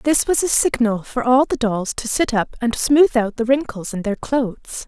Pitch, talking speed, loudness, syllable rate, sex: 240 Hz, 235 wpm, -19 LUFS, 4.7 syllables/s, female